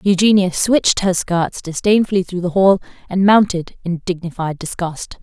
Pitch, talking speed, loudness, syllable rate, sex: 185 Hz, 150 wpm, -17 LUFS, 4.9 syllables/s, female